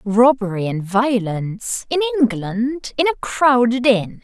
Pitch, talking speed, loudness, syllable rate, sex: 220 Hz, 100 wpm, -18 LUFS, 4.0 syllables/s, female